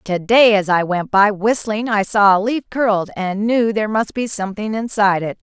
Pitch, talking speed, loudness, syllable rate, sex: 210 Hz, 220 wpm, -17 LUFS, 5.2 syllables/s, female